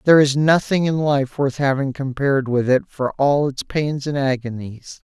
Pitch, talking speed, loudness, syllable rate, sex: 140 Hz, 190 wpm, -19 LUFS, 4.7 syllables/s, male